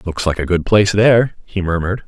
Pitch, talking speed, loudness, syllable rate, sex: 95 Hz, 230 wpm, -15 LUFS, 6.5 syllables/s, male